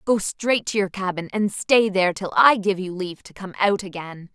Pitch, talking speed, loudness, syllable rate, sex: 195 Hz, 235 wpm, -21 LUFS, 5.1 syllables/s, female